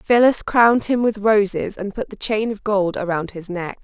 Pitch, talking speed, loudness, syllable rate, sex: 210 Hz, 220 wpm, -19 LUFS, 4.8 syllables/s, female